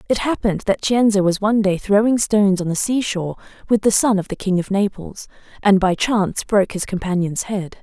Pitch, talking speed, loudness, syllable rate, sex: 200 Hz, 215 wpm, -18 LUFS, 5.8 syllables/s, female